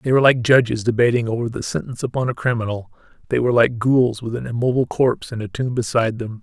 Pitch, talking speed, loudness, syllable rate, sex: 120 Hz, 225 wpm, -19 LUFS, 6.9 syllables/s, male